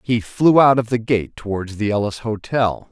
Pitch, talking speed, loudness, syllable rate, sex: 115 Hz, 205 wpm, -18 LUFS, 4.6 syllables/s, male